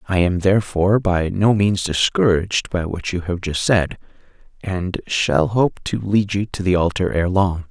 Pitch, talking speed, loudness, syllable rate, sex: 95 Hz, 185 wpm, -19 LUFS, 4.5 syllables/s, male